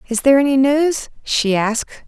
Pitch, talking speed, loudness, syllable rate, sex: 260 Hz, 175 wpm, -16 LUFS, 5.6 syllables/s, female